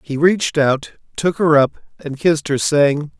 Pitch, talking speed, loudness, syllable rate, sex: 150 Hz, 190 wpm, -17 LUFS, 4.4 syllables/s, male